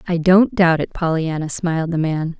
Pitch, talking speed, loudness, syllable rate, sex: 165 Hz, 200 wpm, -18 LUFS, 5.1 syllables/s, female